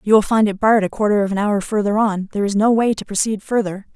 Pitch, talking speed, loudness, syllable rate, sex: 210 Hz, 290 wpm, -18 LUFS, 6.6 syllables/s, female